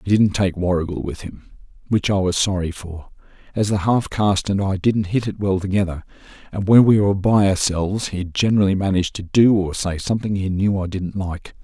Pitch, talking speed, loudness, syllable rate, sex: 95 Hz, 210 wpm, -19 LUFS, 5.7 syllables/s, male